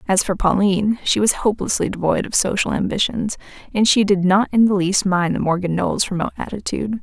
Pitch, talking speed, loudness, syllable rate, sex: 200 Hz, 195 wpm, -18 LUFS, 6.1 syllables/s, female